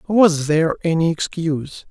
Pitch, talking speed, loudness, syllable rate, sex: 165 Hz, 125 wpm, -18 LUFS, 4.8 syllables/s, male